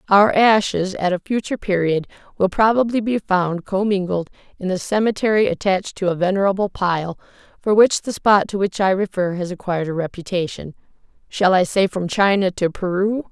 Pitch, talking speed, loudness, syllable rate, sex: 195 Hz, 170 wpm, -19 LUFS, 5.4 syllables/s, female